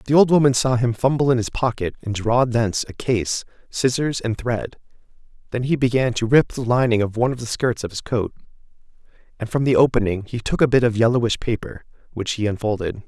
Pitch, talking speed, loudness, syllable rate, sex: 120 Hz, 210 wpm, -20 LUFS, 5.9 syllables/s, male